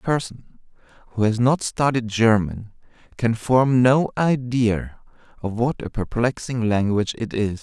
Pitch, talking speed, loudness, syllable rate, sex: 115 Hz, 140 wpm, -21 LUFS, 4.3 syllables/s, male